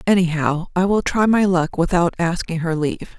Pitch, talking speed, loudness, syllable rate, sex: 175 Hz, 190 wpm, -19 LUFS, 5.1 syllables/s, female